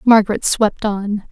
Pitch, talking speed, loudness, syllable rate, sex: 210 Hz, 135 wpm, -17 LUFS, 4.2 syllables/s, female